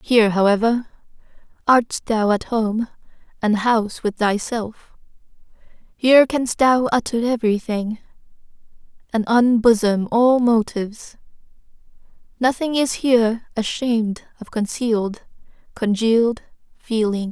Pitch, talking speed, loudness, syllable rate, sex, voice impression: 225 Hz, 95 wpm, -19 LUFS, 4.3 syllables/s, female, very feminine, young, thin, slightly tensed, slightly powerful, slightly dark, soft, clear, fluent, slightly raspy, very cute, very intellectual, very refreshing, sincere, slightly calm, very friendly, very reassuring, very unique, very elegant, slightly wild, very sweet, lively, kind, slightly intense, modest, very light